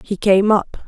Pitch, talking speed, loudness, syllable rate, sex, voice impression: 200 Hz, 205 wpm, -16 LUFS, 3.9 syllables/s, female, feminine, adult-like, relaxed, powerful, soft, muffled, intellectual, slightly friendly, slightly reassuring, elegant, lively, slightly sharp